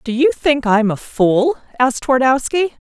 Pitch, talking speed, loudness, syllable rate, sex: 260 Hz, 185 wpm, -16 LUFS, 5.0 syllables/s, female